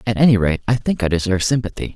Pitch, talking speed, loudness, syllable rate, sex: 105 Hz, 245 wpm, -18 LUFS, 7.3 syllables/s, male